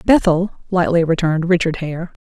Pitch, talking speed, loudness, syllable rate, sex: 175 Hz, 135 wpm, -17 LUFS, 5.4 syllables/s, female